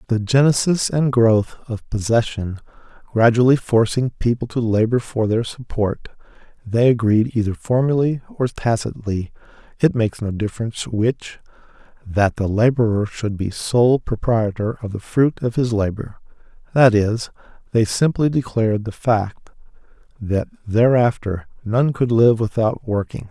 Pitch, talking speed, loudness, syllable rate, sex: 115 Hz, 130 wpm, -19 LUFS, 4.5 syllables/s, male